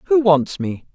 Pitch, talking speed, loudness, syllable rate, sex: 185 Hz, 190 wpm, -18 LUFS, 4.4 syllables/s, female